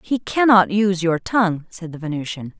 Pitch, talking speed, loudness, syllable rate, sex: 185 Hz, 185 wpm, -19 LUFS, 5.3 syllables/s, female